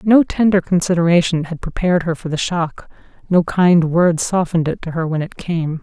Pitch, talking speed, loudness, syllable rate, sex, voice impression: 170 Hz, 195 wpm, -17 LUFS, 5.3 syllables/s, female, slightly masculine, feminine, very gender-neutral, very adult-like, middle-aged, slightly thin, slightly relaxed, slightly weak, slightly dark, soft, slightly muffled, fluent, very cool, very intellectual, very refreshing, sincere, very calm, very friendly, very reassuring, very unique, elegant, sweet, very kind, slightly modest